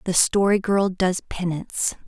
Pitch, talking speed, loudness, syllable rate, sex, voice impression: 185 Hz, 145 wpm, -22 LUFS, 4.6 syllables/s, female, very feminine, slightly young, thin, tensed, slightly powerful, bright, hard, very clear, very fluent, very cute, intellectual, very refreshing, sincere, slightly calm, very friendly, reassuring, very unique, very elegant, slightly wild, very sweet, very lively, strict, intense, slightly sharp